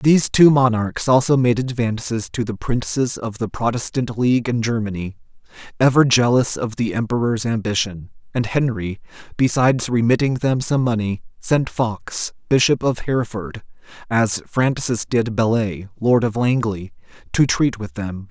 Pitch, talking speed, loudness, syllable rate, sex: 120 Hz, 145 wpm, -19 LUFS, 4.6 syllables/s, male